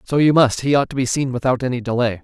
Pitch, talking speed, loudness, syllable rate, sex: 130 Hz, 295 wpm, -18 LUFS, 6.8 syllables/s, male